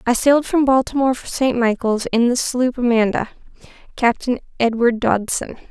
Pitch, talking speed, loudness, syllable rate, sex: 245 Hz, 145 wpm, -18 LUFS, 5.2 syllables/s, female